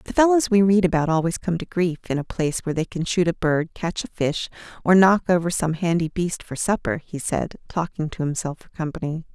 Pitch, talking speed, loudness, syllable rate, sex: 170 Hz, 230 wpm, -22 LUFS, 5.7 syllables/s, female